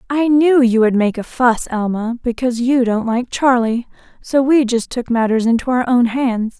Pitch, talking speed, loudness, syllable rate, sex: 240 Hz, 200 wpm, -16 LUFS, 4.7 syllables/s, female